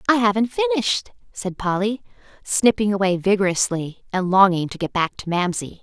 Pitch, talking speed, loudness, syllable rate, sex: 200 Hz, 155 wpm, -20 LUFS, 5.3 syllables/s, female